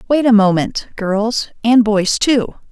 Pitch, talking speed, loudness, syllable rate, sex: 220 Hz, 155 wpm, -15 LUFS, 3.7 syllables/s, female